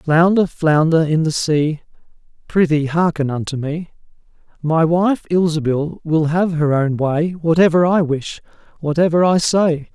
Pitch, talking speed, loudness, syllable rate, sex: 160 Hz, 140 wpm, -17 LUFS, 4.2 syllables/s, male